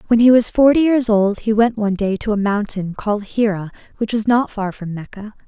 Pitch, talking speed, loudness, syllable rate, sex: 215 Hz, 230 wpm, -17 LUFS, 5.5 syllables/s, female